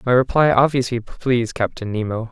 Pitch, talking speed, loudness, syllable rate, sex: 120 Hz, 155 wpm, -19 LUFS, 5.5 syllables/s, male